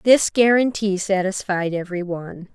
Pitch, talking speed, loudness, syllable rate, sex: 195 Hz, 120 wpm, -20 LUFS, 5.0 syllables/s, female